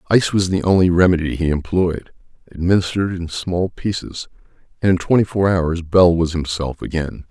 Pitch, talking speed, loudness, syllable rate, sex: 90 Hz, 165 wpm, -18 LUFS, 5.3 syllables/s, male